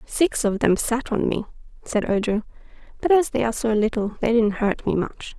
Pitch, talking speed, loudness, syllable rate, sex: 225 Hz, 210 wpm, -22 LUFS, 5.2 syllables/s, female